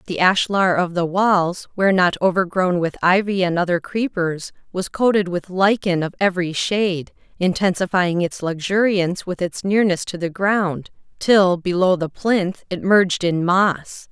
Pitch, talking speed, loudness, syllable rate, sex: 185 Hz, 155 wpm, -19 LUFS, 4.5 syllables/s, female